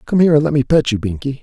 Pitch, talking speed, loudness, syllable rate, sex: 140 Hz, 335 wpm, -15 LUFS, 7.6 syllables/s, male